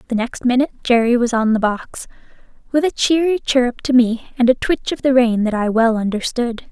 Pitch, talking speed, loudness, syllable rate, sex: 245 Hz, 215 wpm, -17 LUFS, 5.6 syllables/s, female